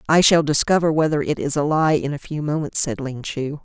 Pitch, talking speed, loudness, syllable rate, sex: 150 Hz, 245 wpm, -20 LUFS, 5.5 syllables/s, female